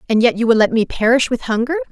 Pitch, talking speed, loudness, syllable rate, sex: 230 Hz, 280 wpm, -16 LUFS, 6.9 syllables/s, female